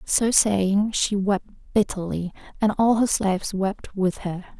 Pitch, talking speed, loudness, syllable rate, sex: 200 Hz, 155 wpm, -23 LUFS, 3.9 syllables/s, female